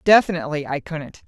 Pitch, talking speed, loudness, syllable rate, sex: 160 Hz, 140 wpm, -22 LUFS, 6.1 syllables/s, female